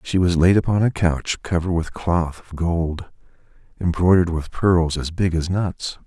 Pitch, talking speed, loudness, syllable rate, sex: 85 Hz, 180 wpm, -20 LUFS, 4.7 syllables/s, male